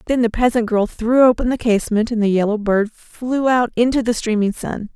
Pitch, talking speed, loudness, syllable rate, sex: 230 Hz, 220 wpm, -17 LUFS, 5.3 syllables/s, female